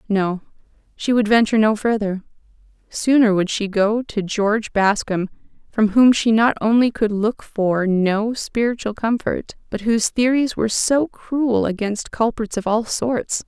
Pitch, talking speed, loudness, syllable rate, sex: 220 Hz, 150 wpm, -19 LUFS, 4.4 syllables/s, female